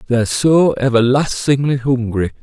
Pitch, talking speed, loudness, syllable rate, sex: 125 Hz, 100 wpm, -15 LUFS, 4.7 syllables/s, male